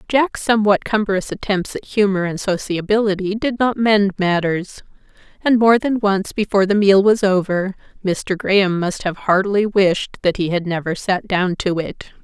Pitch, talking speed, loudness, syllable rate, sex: 195 Hz, 170 wpm, -18 LUFS, 4.8 syllables/s, female